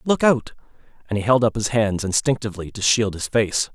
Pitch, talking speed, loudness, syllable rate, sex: 110 Hz, 210 wpm, -20 LUFS, 5.4 syllables/s, male